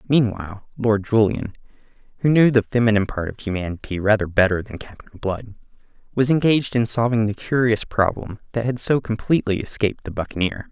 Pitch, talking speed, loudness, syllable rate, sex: 110 Hz, 160 wpm, -21 LUFS, 5.9 syllables/s, male